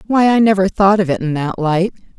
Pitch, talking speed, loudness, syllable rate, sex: 190 Hz, 245 wpm, -15 LUFS, 5.7 syllables/s, female